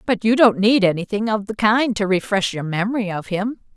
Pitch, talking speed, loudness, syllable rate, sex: 210 Hz, 225 wpm, -19 LUFS, 5.4 syllables/s, female